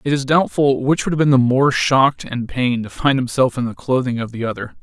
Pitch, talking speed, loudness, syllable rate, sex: 130 Hz, 260 wpm, -17 LUFS, 5.8 syllables/s, male